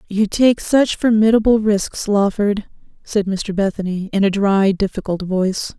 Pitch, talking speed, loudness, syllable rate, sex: 205 Hz, 145 wpm, -17 LUFS, 4.4 syllables/s, female